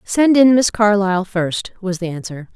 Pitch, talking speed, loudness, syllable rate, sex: 200 Hz, 190 wpm, -16 LUFS, 4.7 syllables/s, female